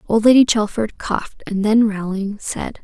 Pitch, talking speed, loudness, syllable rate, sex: 215 Hz, 170 wpm, -18 LUFS, 4.7 syllables/s, female